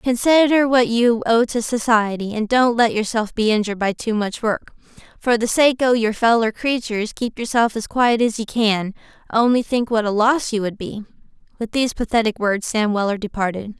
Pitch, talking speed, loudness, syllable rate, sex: 225 Hz, 195 wpm, -19 LUFS, 5.1 syllables/s, female